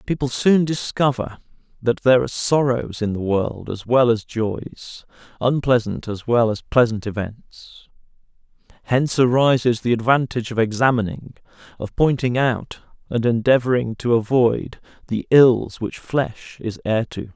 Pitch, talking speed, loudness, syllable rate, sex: 120 Hz, 140 wpm, -20 LUFS, 4.5 syllables/s, male